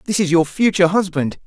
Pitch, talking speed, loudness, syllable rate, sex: 180 Hz, 205 wpm, -17 LUFS, 6.3 syllables/s, male